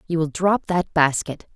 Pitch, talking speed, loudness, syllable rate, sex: 165 Hz, 195 wpm, -21 LUFS, 4.6 syllables/s, female